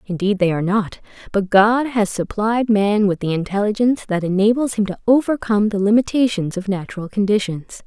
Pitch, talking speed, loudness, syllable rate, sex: 205 Hz, 170 wpm, -18 LUFS, 5.6 syllables/s, female